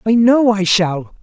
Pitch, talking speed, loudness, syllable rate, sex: 210 Hz, 195 wpm, -14 LUFS, 3.9 syllables/s, male